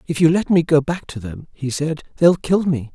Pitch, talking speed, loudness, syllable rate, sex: 155 Hz, 265 wpm, -18 LUFS, 5.1 syllables/s, male